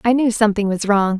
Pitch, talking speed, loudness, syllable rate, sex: 215 Hz, 250 wpm, -17 LUFS, 6.4 syllables/s, female